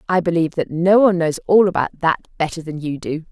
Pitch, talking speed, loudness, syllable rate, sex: 165 Hz, 235 wpm, -18 LUFS, 6.1 syllables/s, female